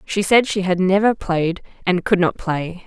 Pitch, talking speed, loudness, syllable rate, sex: 185 Hz, 210 wpm, -18 LUFS, 4.4 syllables/s, female